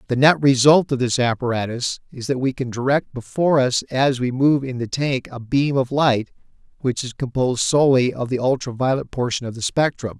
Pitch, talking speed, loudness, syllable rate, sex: 130 Hz, 205 wpm, -20 LUFS, 5.4 syllables/s, male